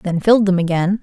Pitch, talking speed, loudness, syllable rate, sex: 190 Hz, 235 wpm, -15 LUFS, 6.1 syllables/s, female